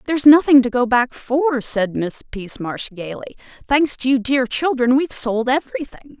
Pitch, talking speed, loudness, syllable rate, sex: 255 Hz, 175 wpm, -18 LUFS, 4.8 syllables/s, female